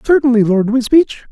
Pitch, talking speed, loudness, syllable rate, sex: 250 Hz, 135 wpm, -12 LUFS, 5.4 syllables/s, male